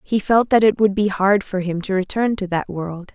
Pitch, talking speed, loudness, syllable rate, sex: 200 Hz, 265 wpm, -19 LUFS, 4.9 syllables/s, female